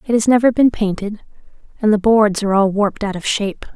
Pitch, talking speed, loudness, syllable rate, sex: 210 Hz, 225 wpm, -16 LUFS, 6.1 syllables/s, female